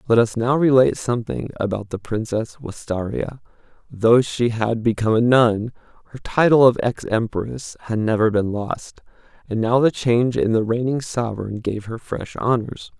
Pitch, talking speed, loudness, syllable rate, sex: 115 Hz, 160 wpm, -20 LUFS, 4.9 syllables/s, male